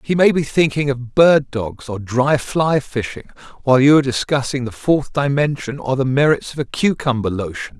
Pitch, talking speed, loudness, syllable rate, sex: 135 Hz, 195 wpm, -17 LUFS, 5.0 syllables/s, male